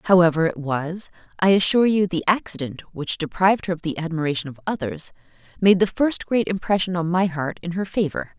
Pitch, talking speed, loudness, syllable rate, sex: 175 Hz, 195 wpm, -22 LUFS, 5.7 syllables/s, female